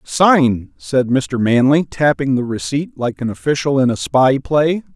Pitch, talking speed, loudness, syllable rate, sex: 135 Hz, 170 wpm, -16 LUFS, 4.1 syllables/s, male